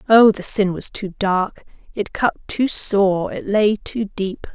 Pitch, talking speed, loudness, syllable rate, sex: 200 Hz, 185 wpm, -19 LUFS, 3.6 syllables/s, female